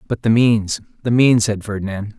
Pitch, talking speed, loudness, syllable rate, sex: 110 Hz, 165 wpm, -17 LUFS, 4.5 syllables/s, male